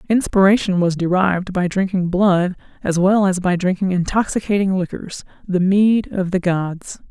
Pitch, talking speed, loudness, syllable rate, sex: 185 Hz, 145 wpm, -18 LUFS, 4.7 syllables/s, female